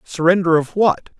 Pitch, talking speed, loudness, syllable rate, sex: 175 Hz, 150 wpm, -16 LUFS, 4.7 syllables/s, male